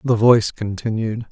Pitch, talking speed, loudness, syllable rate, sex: 110 Hz, 135 wpm, -18 LUFS, 5.0 syllables/s, male